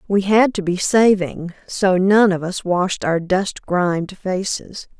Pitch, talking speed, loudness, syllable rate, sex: 190 Hz, 170 wpm, -18 LUFS, 3.7 syllables/s, female